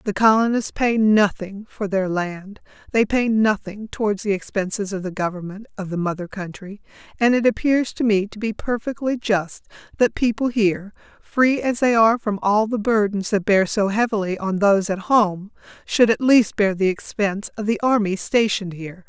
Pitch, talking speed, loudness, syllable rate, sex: 210 Hz, 185 wpm, -20 LUFS, 5.0 syllables/s, female